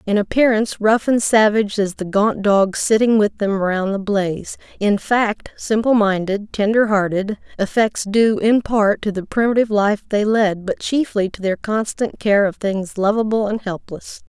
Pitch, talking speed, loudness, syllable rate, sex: 210 Hz, 175 wpm, -18 LUFS, 4.7 syllables/s, female